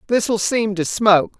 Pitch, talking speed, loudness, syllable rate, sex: 210 Hz, 215 wpm, -18 LUFS, 5.1 syllables/s, female